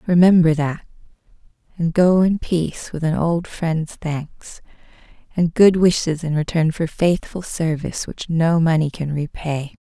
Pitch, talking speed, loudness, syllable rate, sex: 165 Hz, 145 wpm, -19 LUFS, 4.3 syllables/s, female